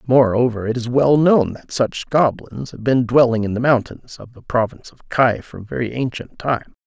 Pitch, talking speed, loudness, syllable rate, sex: 120 Hz, 200 wpm, -18 LUFS, 4.8 syllables/s, male